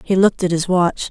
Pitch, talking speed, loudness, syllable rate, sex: 180 Hz, 270 wpm, -17 LUFS, 5.9 syllables/s, female